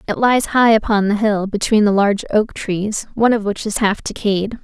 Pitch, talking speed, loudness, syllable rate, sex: 210 Hz, 220 wpm, -17 LUFS, 5.1 syllables/s, female